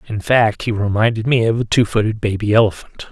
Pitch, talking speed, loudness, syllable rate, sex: 110 Hz, 210 wpm, -16 LUFS, 5.8 syllables/s, male